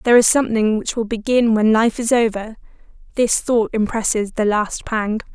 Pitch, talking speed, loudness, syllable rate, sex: 225 Hz, 180 wpm, -18 LUFS, 5.1 syllables/s, female